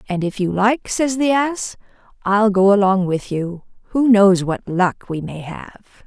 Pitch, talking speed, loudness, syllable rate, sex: 200 Hz, 190 wpm, -18 LUFS, 3.9 syllables/s, female